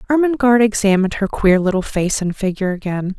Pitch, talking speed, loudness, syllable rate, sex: 205 Hz, 170 wpm, -17 LUFS, 6.4 syllables/s, female